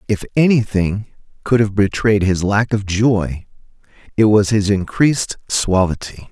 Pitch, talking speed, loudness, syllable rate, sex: 100 Hz, 135 wpm, -16 LUFS, 4.5 syllables/s, male